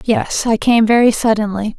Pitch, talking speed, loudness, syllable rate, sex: 220 Hz, 170 wpm, -14 LUFS, 4.8 syllables/s, female